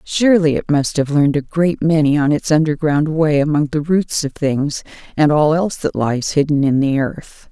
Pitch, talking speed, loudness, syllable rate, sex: 150 Hz, 210 wpm, -16 LUFS, 4.9 syllables/s, female